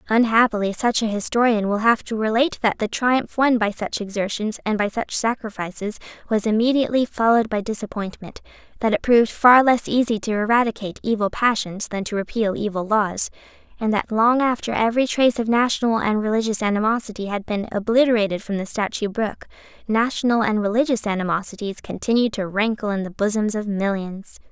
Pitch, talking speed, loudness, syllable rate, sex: 220 Hz, 170 wpm, -21 LUFS, 5.9 syllables/s, female